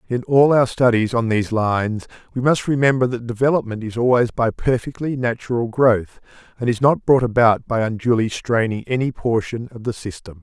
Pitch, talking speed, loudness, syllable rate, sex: 120 Hz, 180 wpm, -19 LUFS, 5.3 syllables/s, male